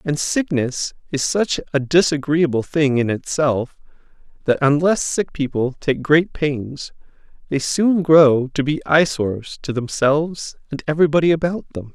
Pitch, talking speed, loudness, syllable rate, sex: 150 Hz, 140 wpm, -19 LUFS, 4.4 syllables/s, male